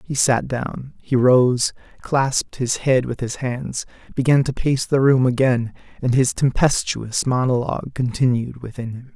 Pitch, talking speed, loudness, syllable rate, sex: 125 Hz, 155 wpm, -20 LUFS, 4.3 syllables/s, male